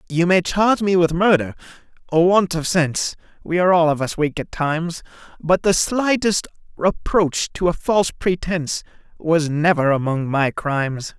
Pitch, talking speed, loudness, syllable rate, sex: 165 Hz, 160 wpm, -19 LUFS, 4.1 syllables/s, male